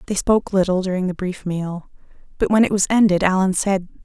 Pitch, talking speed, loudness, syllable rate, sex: 190 Hz, 210 wpm, -19 LUFS, 5.9 syllables/s, female